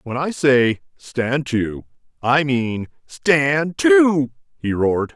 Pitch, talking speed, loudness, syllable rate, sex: 130 Hz, 130 wpm, -19 LUFS, 3.0 syllables/s, male